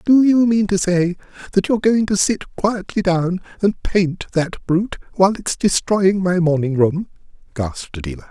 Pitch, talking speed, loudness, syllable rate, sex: 185 Hz, 175 wpm, -18 LUFS, 4.8 syllables/s, male